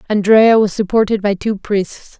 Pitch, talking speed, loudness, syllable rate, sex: 205 Hz, 165 wpm, -14 LUFS, 4.5 syllables/s, female